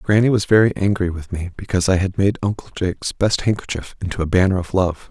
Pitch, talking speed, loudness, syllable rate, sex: 95 Hz, 225 wpm, -19 LUFS, 6.2 syllables/s, male